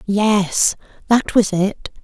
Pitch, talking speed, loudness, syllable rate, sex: 205 Hz, 120 wpm, -17 LUFS, 2.7 syllables/s, female